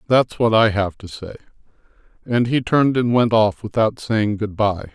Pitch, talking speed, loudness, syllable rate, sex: 110 Hz, 195 wpm, -18 LUFS, 4.8 syllables/s, male